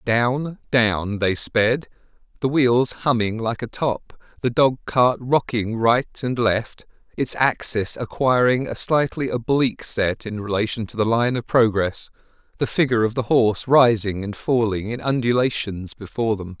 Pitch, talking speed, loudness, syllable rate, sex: 120 Hz, 155 wpm, -21 LUFS, 4.4 syllables/s, male